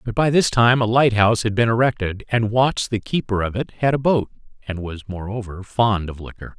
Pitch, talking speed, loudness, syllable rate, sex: 110 Hz, 220 wpm, -20 LUFS, 5.4 syllables/s, male